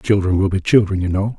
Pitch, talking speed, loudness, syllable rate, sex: 100 Hz, 260 wpm, -17 LUFS, 5.9 syllables/s, male